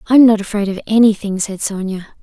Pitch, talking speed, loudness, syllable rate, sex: 205 Hz, 190 wpm, -15 LUFS, 5.7 syllables/s, female